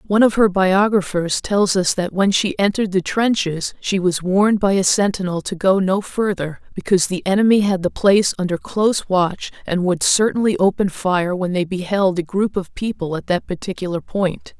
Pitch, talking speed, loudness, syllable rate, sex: 190 Hz, 195 wpm, -18 LUFS, 5.1 syllables/s, female